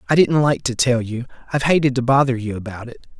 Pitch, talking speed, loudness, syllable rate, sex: 125 Hz, 225 wpm, -18 LUFS, 6.4 syllables/s, male